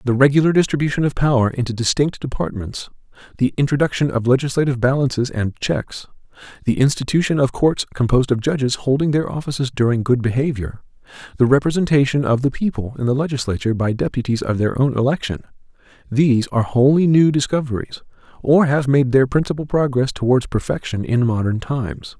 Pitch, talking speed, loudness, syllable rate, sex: 130 Hz, 155 wpm, -18 LUFS, 6.0 syllables/s, male